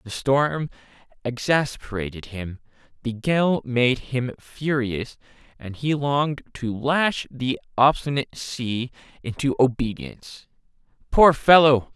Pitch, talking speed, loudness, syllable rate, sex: 130 Hz, 105 wpm, -22 LUFS, 3.8 syllables/s, male